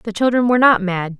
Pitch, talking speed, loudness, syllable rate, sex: 215 Hz, 250 wpm, -15 LUFS, 6.1 syllables/s, female